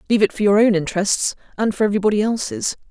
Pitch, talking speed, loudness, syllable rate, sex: 210 Hz, 205 wpm, -19 LUFS, 7.6 syllables/s, female